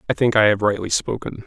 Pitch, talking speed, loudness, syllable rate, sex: 105 Hz, 245 wpm, -19 LUFS, 6.2 syllables/s, male